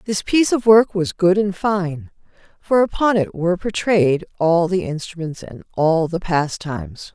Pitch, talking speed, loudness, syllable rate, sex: 185 Hz, 170 wpm, -18 LUFS, 4.4 syllables/s, female